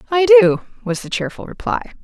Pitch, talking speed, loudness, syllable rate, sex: 235 Hz, 175 wpm, -16 LUFS, 5.2 syllables/s, female